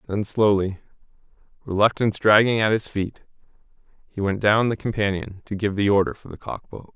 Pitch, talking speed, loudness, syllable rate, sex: 105 Hz, 170 wpm, -22 LUFS, 5.6 syllables/s, male